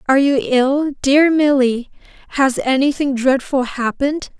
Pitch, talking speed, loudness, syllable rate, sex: 270 Hz, 125 wpm, -16 LUFS, 4.4 syllables/s, female